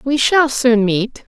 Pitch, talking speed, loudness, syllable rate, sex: 250 Hz, 180 wpm, -15 LUFS, 3.4 syllables/s, female